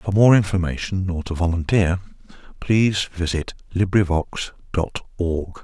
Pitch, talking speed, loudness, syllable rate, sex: 90 Hz, 115 wpm, -21 LUFS, 4.3 syllables/s, male